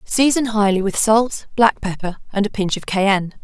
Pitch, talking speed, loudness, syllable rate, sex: 210 Hz, 190 wpm, -18 LUFS, 4.9 syllables/s, female